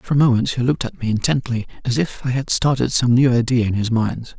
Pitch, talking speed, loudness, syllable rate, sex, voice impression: 125 Hz, 260 wpm, -19 LUFS, 6.1 syllables/s, male, masculine, very adult-like, slightly weak, cool, sincere, very calm, wild